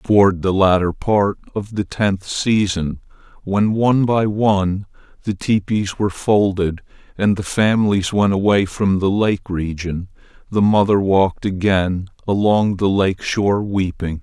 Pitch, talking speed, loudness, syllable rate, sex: 100 Hz, 145 wpm, -18 LUFS, 4.3 syllables/s, male